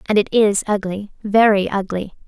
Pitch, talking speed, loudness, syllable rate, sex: 200 Hz, 130 wpm, -18 LUFS, 4.9 syllables/s, female